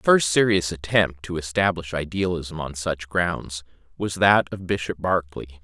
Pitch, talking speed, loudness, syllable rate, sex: 85 Hz, 160 wpm, -23 LUFS, 4.6 syllables/s, male